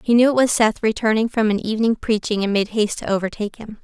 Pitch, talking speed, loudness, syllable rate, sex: 220 Hz, 250 wpm, -19 LUFS, 6.7 syllables/s, female